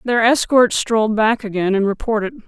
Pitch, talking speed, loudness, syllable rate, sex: 220 Hz, 170 wpm, -17 LUFS, 5.1 syllables/s, female